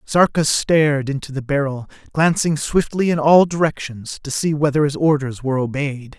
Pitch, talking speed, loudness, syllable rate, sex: 145 Hz, 165 wpm, -18 LUFS, 5.0 syllables/s, male